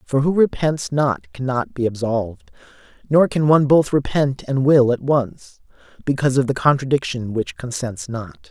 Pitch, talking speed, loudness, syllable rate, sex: 135 Hz, 160 wpm, -19 LUFS, 4.7 syllables/s, male